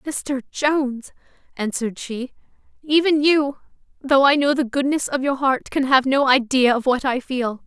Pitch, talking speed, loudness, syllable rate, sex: 270 Hz, 170 wpm, -19 LUFS, 4.5 syllables/s, female